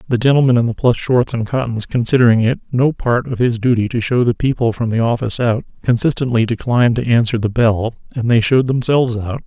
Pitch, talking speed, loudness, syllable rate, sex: 120 Hz, 215 wpm, -16 LUFS, 6.1 syllables/s, male